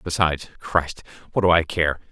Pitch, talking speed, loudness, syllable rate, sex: 80 Hz, 170 wpm, -22 LUFS, 5.3 syllables/s, male